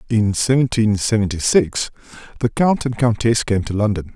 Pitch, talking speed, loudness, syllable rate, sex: 110 Hz, 160 wpm, -18 LUFS, 5.0 syllables/s, male